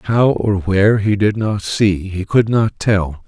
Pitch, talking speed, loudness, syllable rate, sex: 100 Hz, 200 wpm, -16 LUFS, 3.7 syllables/s, male